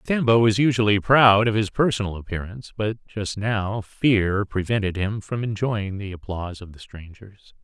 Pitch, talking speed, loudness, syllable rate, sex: 105 Hz, 165 wpm, -22 LUFS, 4.9 syllables/s, male